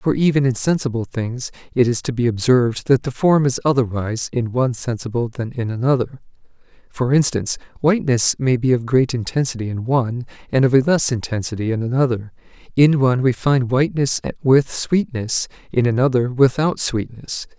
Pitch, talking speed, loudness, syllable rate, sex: 125 Hz, 165 wpm, -19 LUFS, 5.5 syllables/s, male